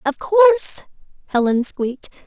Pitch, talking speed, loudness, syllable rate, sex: 315 Hz, 105 wpm, -17 LUFS, 4.7 syllables/s, female